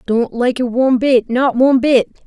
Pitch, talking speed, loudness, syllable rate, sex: 250 Hz, 210 wpm, -14 LUFS, 5.1 syllables/s, female